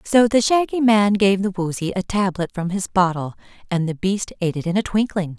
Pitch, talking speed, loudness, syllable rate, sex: 195 Hz, 225 wpm, -20 LUFS, 5.4 syllables/s, female